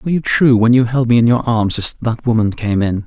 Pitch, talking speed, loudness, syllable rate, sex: 115 Hz, 295 wpm, -14 LUFS, 5.7 syllables/s, male